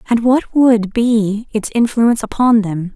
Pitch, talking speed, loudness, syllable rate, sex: 225 Hz, 165 wpm, -14 LUFS, 4.1 syllables/s, female